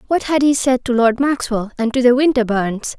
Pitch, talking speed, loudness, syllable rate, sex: 250 Hz, 200 wpm, -16 LUFS, 5.5 syllables/s, female